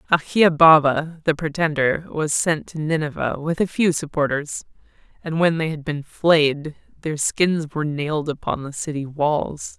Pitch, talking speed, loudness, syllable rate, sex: 155 Hz, 155 wpm, -20 LUFS, 4.4 syllables/s, female